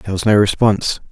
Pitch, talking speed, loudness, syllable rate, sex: 100 Hz, 215 wpm, -15 LUFS, 7.0 syllables/s, male